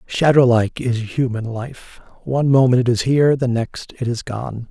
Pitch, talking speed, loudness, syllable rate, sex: 125 Hz, 190 wpm, -18 LUFS, 4.7 syllables/s, male